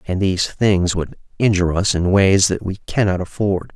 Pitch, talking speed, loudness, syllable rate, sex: 95 Hz, 190 wpm, -18 LUFS, 5.0 syllables/s, male